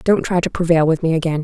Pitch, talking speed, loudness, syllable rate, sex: 165 Hz, 290 wpm, -17 LUFS, 6.8 syllables/s, female